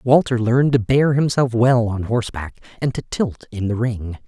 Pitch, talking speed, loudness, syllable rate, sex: 120 Hz, 195 wpm, -19 LUFS, 4.9 syllables/s, male